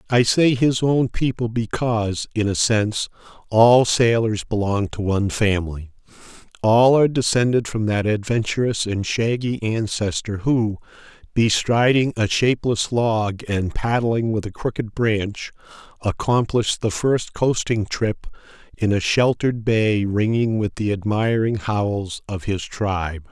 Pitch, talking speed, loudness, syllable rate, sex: 110 Hz, 135 wpm, -20 LUFS, 4.3 syllables/s, male